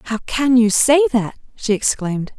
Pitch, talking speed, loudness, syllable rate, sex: 225 Hz, 175 wpm, -16 LUFS, 4.7 syllables/s, female